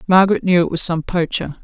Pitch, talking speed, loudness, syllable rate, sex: 175 Hz, 220 wpm, -17 LUFS, 6.1 syllables/s, female